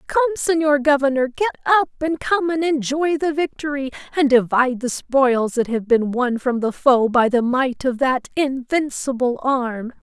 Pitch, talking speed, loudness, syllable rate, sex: 270 Hz, 170 wpm, -19 LUFS, 4.5 syllables/s, female